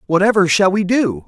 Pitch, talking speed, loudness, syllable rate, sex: 185 Hz, 190 wpm, -15 LUFS, 5.4 syllables/s, male